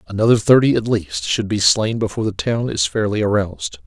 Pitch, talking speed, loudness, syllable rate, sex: 105 Hz, 200 wpm, -17 LUFS, 5.7 syllables/s, male